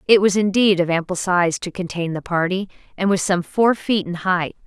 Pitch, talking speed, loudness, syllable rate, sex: 185 Hz, 220 wpm, -19 LUFS, 5.1 syllables/s, female